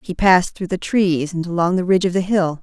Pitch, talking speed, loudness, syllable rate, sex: 180 Hz, 275 wpm, -18 LUFS, 5.9 syllables/s, female